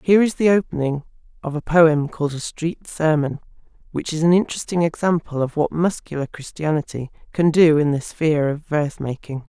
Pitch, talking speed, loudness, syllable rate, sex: 155 Hz, 175 wpm, -20 LUFS, 5.6 syllables/s, female